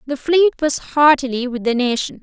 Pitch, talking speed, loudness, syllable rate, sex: 275 Hz, 190 wpm, -17 LUFS, 5.1 syllables/s, female